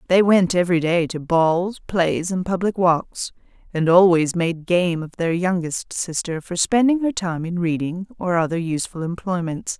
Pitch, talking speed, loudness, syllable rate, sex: 175 Hz, 170 wpm, -20 LUFS, 4.6 syllables/s, female